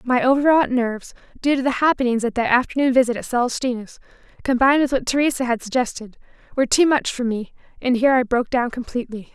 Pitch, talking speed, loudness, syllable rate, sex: 250 Hz, 195 wpm, -20 LUFS, 6.7 syllables/s, female